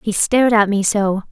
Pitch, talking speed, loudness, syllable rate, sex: 210 Hz, 230 wpm, -15 LUFS, 5.2 syllables/s, female